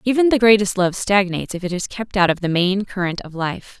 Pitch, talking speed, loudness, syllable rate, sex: 195 Hz, 255 wpm, -19 LUFS, 5.7 syllables/s, female